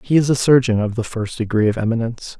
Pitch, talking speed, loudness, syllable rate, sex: 120 Hz, 250 wpm, -18 LUFS, 6.6 syllables/s, male